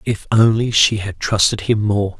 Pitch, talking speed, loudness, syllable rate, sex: 105 Hz, 190 wpm, -16 LUFS, 4.4 syllables/s, male